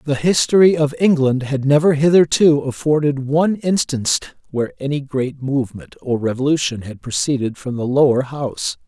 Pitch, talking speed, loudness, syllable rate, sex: 140 Hz, 150 wpm, -17 LUFS, 5.3 syllables/s, male